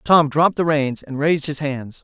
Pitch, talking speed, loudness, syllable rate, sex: 145 Hz, 235 wpm, -19 LUFS, 5.2 syllables/s, male